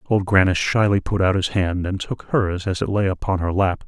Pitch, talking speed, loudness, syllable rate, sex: 95 Hz, 250 wpm, -20 LUFS, 5.1 syllables/s, male